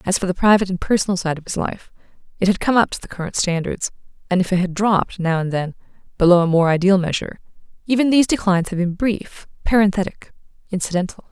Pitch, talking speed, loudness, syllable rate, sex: 190 Hz, 205 wpm, -19 LUFS, 6.8 syllables/s, female